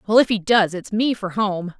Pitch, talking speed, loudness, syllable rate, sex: 205 Hz, 265 wpm, -20 LUFS, 4.9 syllables/s, female